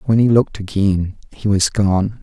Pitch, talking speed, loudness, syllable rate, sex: 100 Hz, 190 wpm, -17 LUFS, 4.6 syllables/s, male